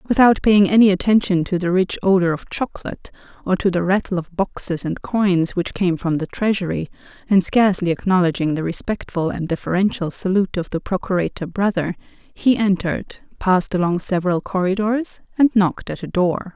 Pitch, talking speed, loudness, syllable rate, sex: 185 Hz, 165 wpm, -19 LUFS, 5.5 syllables/s, female